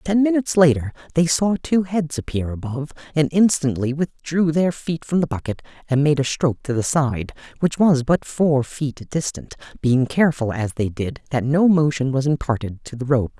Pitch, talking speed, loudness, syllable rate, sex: 145 Hz, 195 wpm, -20 LUFS, 5.0 syllables/s, male